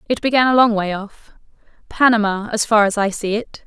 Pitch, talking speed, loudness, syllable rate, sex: 215 Hz, 195 wpm, -17 LUFS, 5.4 syllables/s, female